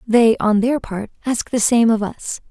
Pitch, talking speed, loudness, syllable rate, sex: 225 Hz, 215 wpm, -18 LUFS, 4.2 syllables/s, female